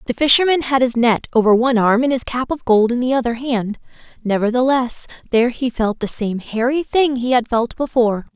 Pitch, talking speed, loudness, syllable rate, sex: 245 Hz, 210 wpm, -17 LUFS, 5.6 syllables/s, female